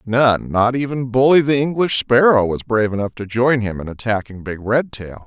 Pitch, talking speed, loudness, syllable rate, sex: 115 Hz, 205 wpm, -17 LUFS, 5.2 syllables/s, male